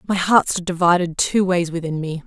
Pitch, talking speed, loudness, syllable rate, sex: 175 Hz, 210 wpm, -19 LUFS, 5.3 syllables/s, female